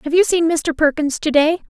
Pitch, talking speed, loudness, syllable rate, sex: 315 Hz, 235 wpm, -17 LUFS, 5.4 syllables/s, female